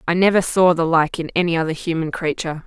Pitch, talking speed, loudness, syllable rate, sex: 170 Hz, 225 wpm, -19 LUFS, 6.4 syllables/s, female